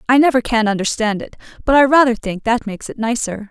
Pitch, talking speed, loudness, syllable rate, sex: 230 Hz, 225 wpm, -16 LUFS, 6.2 syllables/s, female